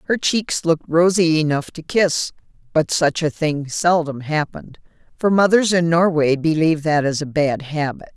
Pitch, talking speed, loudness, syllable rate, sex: 160 Hz, 170 wpm, -18 LUFS, 4.7 syllables/s, female